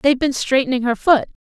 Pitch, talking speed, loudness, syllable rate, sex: 265 Hz, 210 wpm, -17 LUFS, 6.5 syllables/s, female